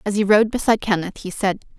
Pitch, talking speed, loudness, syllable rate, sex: 205 Hz, 235 wpm, -19 LUFS, 6.4 syllables/s, female